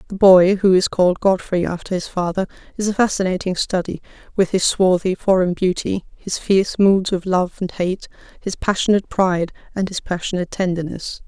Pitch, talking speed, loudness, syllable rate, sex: 185 Hz, 170 wpm, -19 LUFS, 5.5 syllables/s, female